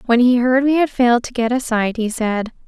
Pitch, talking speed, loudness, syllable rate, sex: 240 Hz, 270 wpm, -17 LUFS, 5.4 syllables/s, female